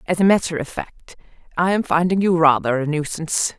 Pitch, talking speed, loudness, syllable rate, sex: 165 Hz, 200 wpm, -19 LUFS, 5.6 syllables/s, female